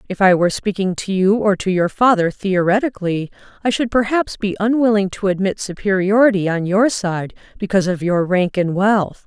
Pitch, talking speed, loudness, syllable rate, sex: 195 Hz, 180 wpm, -17 LUFS, 5.3 syllables/s, female